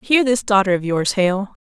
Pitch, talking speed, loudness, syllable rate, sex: 205 Hz, 215 wpm, -18 LUFS, 4.7 syllables/s, female